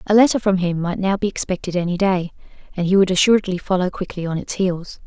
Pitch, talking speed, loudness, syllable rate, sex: 185 Hz, 225 wpm, -19 LUFS, 6.2 syllables/s, female